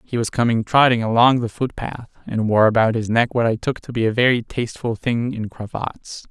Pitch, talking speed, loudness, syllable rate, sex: 115 Hz, 230 wpm, -19 LUFS, 5.2 syllables/s, male